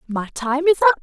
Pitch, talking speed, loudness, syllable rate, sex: 290 Hz, 235 wpm, -19 LUFS, 6.8 syllables/s, female